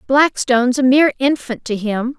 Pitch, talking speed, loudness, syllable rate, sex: 260 Hz, 165 wpm, -16 LUFS, 5.1 syllables/s, female